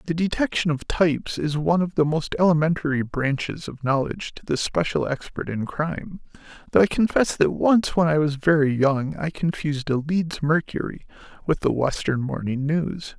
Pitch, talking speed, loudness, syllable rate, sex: 155 Hz, 180 wpm, -23 LUFS, 5.0 syllables/s, male